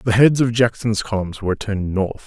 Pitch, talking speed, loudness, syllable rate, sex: 110 Hz, 210 wpm, -19 LUFS, 5.4 syllables/s, male